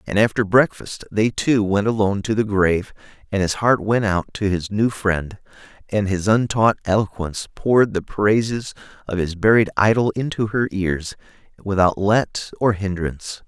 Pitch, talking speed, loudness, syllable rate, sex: 100 Hz, 165 wpm, -20 LUFS, 4.8 syllables/s, male